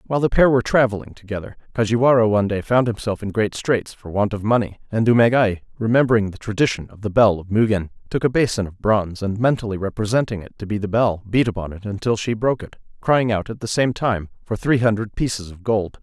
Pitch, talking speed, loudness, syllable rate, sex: 110 Hz, 220 wpm, -20 LUFS, 6.2 syllables/s, male